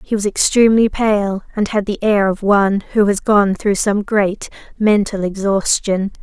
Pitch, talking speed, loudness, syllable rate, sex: 205 Hz, 175 wpm, -16 LUFS, 4.6 syllables/s, female